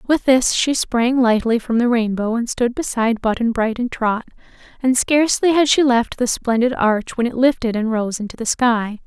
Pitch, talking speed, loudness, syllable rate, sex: 240 Hz, 205 wpm, -18 LUFS, 4.9 syllables/s, female